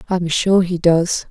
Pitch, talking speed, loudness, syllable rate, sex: 175 Hz, 230 wpm, -16 LUFS, 4.6 syllables/s, female